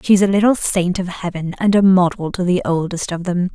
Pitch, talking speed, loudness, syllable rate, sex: 180 Hz, 235 wpm, -17 LUFS, 5.3 syllables/s, female